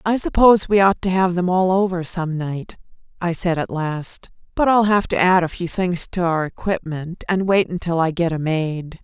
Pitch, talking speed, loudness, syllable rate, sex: 175 Hz, 220 wpm, -19 LUFS, 4.7 syllables/s, female